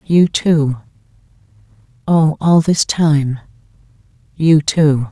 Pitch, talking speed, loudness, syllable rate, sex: 140 Hz, 80 wpm, -14 LUFS, 2.9 syllables/s, female